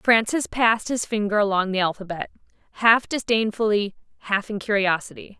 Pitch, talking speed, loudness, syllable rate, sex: 210 Hz, 135 wpm, -22 LUFS, 5.2 syllables/s, female